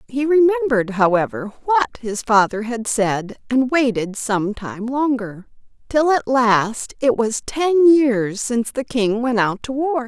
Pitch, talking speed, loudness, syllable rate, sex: 240 Hz, 160 wpm, -18 LUFS, 4.0 syllables/s, female